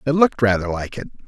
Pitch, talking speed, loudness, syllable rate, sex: 120 Hz, 235 wpm, -19 LUFS, 7.6 syllables/s, male